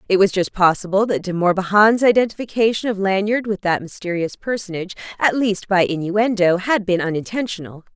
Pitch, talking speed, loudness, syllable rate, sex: 195 Hz, 160 wpm, -18 LUFS, 5.6 syllables/s, female